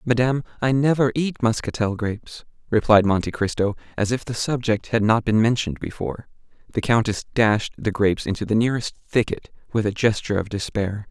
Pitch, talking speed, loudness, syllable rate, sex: 110 Hz, 175 wpm, -22 LUFS, 5.8 syllables/s, male